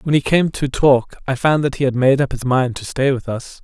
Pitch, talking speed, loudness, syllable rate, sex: 135 Hz, 295 wpm, -17 LUFS, 5.3 syllables/s, male